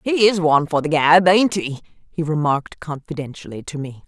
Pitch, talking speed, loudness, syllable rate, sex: 160 Hz, 190 wpm, -18 LUFS, 5.2 syllables/s, female